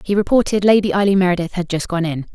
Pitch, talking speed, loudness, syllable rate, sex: 185 Hz, 230 wpm, -17 LUFS, 6.9 syllables/s, female